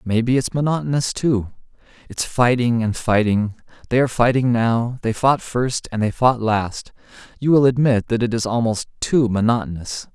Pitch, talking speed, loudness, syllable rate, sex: 120 Hz, 165 wpm, -19 LUFS, 4.8 syllables/s, male